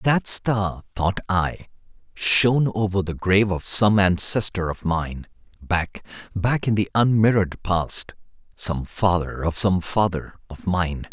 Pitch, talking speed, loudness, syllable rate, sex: 95 Hz, 140 wpm, -21 LUFS, 4.0 syllables/s, male